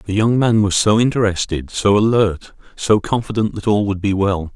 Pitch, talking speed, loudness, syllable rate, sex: 100 Hz, 200 wpm, -17 LUFS, 4.9 syllables/s, male